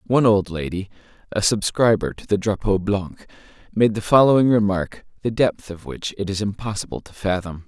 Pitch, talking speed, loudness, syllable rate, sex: 100 Hz, 170 wpm, -21 LUFS, 5.3 syllables/s, male